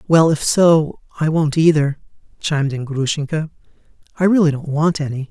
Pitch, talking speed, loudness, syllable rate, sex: 155 Hz, 160 wpm, -17 LUFS, 5.2 syllables/s, male